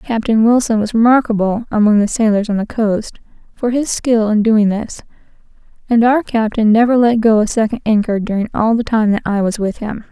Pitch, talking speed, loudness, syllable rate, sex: 220 Hz, 200 wpm, -14 LUFS, 5.4 syllables/s, female